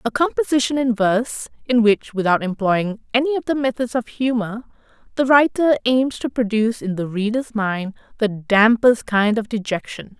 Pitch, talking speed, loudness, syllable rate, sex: 230 Hz, 165 wpm, -19 LUFS, 4.9 syllables/s, female